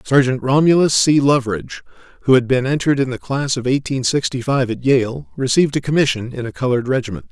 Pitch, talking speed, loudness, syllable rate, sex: 130 Hz, 195 wpm, -17 LUFS, 6.3 syllables/s, male